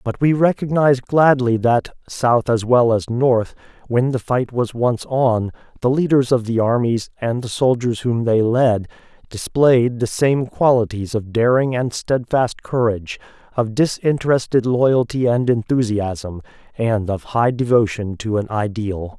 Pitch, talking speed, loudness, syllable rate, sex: 120 Hz, 150 wpm, -18 LUFS, 4.2 syllables/s, male